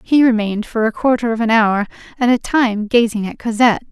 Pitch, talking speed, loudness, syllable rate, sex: 230 Hz, 215 wpm, -16 LUFS, 5.8 syllables/s, female